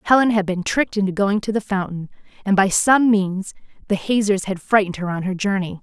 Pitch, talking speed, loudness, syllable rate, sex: 200 Hz, 215 wpm, -19 LUFS, 5.8 syllables/s, female